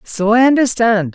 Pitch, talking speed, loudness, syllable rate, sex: 225 Hz, 155 wpm, -13 LUFS, 4.6 syllables/s, female